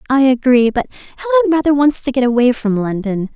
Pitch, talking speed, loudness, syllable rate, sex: 260 Hz, 195 wpm, -14 LUFS, 6.3 syllables/s, female